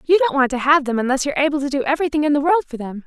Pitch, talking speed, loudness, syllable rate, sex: 285 Hz, 335 wpm, -18 LUFS, 7.7 syllables/s, female